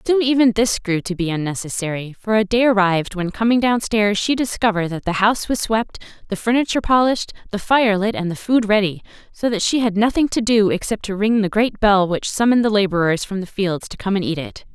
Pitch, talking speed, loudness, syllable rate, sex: 210 Hz, 230 wpm, -18 LUFS, 5.9 syllables/s, female